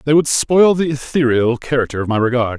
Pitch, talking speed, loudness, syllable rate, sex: 135 Hz, 210 wpm, -15 LUFS, 5.6 syllables/s, male